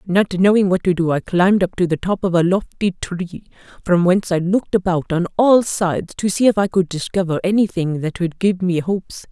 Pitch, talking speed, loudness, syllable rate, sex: 185 Hz, 225 wpm, -18 LUFS, 5.5 syllables/s, female